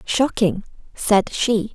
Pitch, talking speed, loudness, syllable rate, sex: 215 Hz, 105 wpm, -20 LUFS, 2.9 syllables/s, female